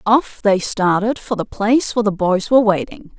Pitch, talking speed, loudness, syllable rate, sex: 210 Hz, 205 wpm, -17 LUFS, 5.3 syllables/s, female